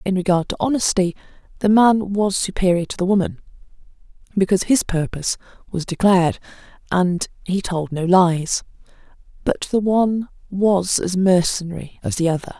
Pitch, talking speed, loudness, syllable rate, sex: 185 Hz, 140 wpm, -19 LUFS, 5.3 syllables/s, female